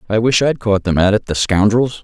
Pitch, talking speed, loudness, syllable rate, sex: 110 Hz, 265 wpm, -15 LUFS, 5.5 syllables/s, male